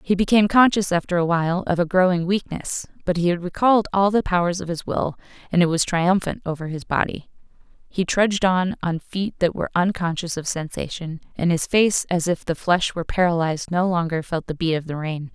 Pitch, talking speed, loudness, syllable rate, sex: 175 Hz, 210 wpm, -21 LUFS, 5.7 syllables/s, female